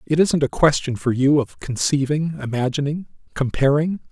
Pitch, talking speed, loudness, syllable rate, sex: 140 Hz, 145 wpm, -20 LUFS, 5.0 syllables/s, male